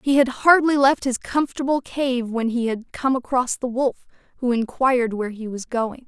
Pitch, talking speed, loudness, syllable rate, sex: 250 Hz, 200 wpm, -21 LUFS, 5.0 syllables/s, female